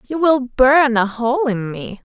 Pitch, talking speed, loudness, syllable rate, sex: 250 Hz, 200 wpm, -16 LUFS, 3.6 syllables/s, female